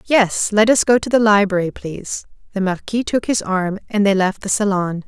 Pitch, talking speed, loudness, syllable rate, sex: 205 Hz, 215 wpm, -17 LUFS, 5.0 syllables/s, female